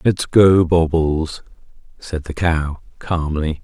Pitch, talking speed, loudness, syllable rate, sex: 80 Hz, 100 wpm, -18 LUFS, 3.2 syllables/s, male